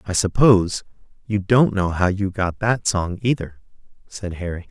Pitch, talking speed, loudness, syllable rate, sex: 100 Hz, 165 wpm, -20 LUFS, 4.6 syllables/s, male